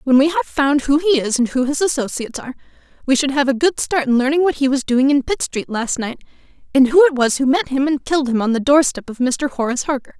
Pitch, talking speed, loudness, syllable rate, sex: 275 Hz, 270 wpm, -17 LUFS, 6.2 syllables/s, female